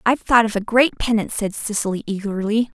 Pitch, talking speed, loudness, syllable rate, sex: 215 Hz, 195 wpm, -19 LUFS, 6.3 syllables/s, female